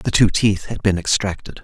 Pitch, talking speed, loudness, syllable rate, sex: 95 Hz, 220 wpm, -18 LUFS, 5.0 syllables/s, male